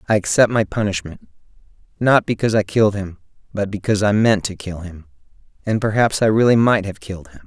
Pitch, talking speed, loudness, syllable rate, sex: 100 Hz, 195 wpm, -18 LUFS, 6.2 syllables/s, male